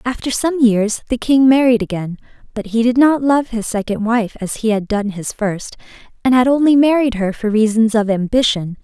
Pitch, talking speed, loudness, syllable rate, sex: 230 Hz, 205 wpm, -15 LUFS, 5.0 syllables/s, female